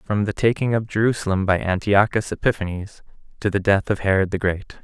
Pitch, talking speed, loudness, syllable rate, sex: 100 Hz, 185 wpm, -21 LUFS, 5.6 syllables/s, male